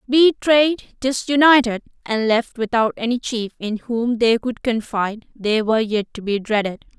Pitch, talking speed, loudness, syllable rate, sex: 235 Hz, 155 wpm, -19 LUFS, 4.6 syllables/s, female